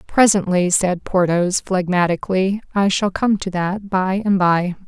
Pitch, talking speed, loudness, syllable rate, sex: 190 Hz, 150 wpm, -18 LUFS, 4.3 syllables/s, female